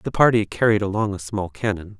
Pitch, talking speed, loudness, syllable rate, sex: 100 Hz, 210 wpm, -21 LUFS, 5.6 syllables/s, male